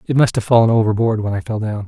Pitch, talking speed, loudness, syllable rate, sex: 110 Hz, 290 wpm, -16 LUFS, 6.8 syllables/s, male